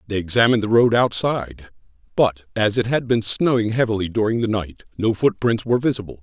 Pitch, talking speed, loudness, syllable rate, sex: 110 Hz, 185 wpm, -20 LUFS, 5.9 syllables/s, male